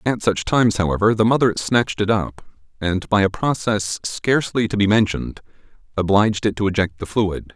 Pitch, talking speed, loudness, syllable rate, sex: 105 Hz, 185 wpm, -19 LUFS, 5.5 syllables/s, male